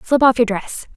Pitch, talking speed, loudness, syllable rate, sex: 235 Hz, 250 wpm, -16 LUFS, 4.9 syllables/s, female